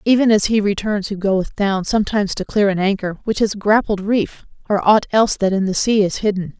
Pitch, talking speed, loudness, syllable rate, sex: 205 Hz, 225 wpm, -17 LUFS, 5.6 syllables/s, female